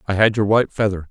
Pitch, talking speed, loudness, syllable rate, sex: 105 Hz, 270 wpm, -18 LUFS, 7.4 syllables/s, male